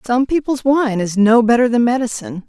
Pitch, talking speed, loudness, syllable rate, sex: 235 Hz, 195 wpm, -15 LUFS, 5.6 syllables/s, female